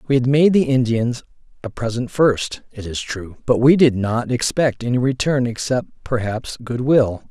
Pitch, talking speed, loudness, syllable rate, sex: 125 Hz, 175 wpm, -19 LUFS, 4.5 syllables/s, male